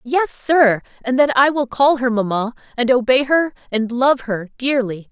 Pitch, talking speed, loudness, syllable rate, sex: 250 Hz, 190 wpm, -17 LUFS, 4.4 syllables/s, female